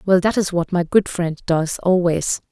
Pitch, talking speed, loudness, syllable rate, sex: 180 Hz, 215 wpm, -19 LUFS, 4.4 syllables/s, female